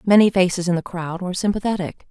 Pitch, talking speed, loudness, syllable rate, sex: 185 Hz, 200 wpm, -20 LUFS, 6.5 syllables/s, female